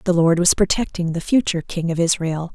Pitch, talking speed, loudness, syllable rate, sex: 175 Hz, 210 wpm, -19 LUFS, 5.9 syllables/s, female